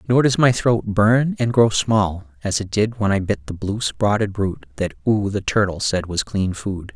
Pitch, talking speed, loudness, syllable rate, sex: 105 Hz, 225 wpm, -20 LUFS, 4.4 syllables/s, male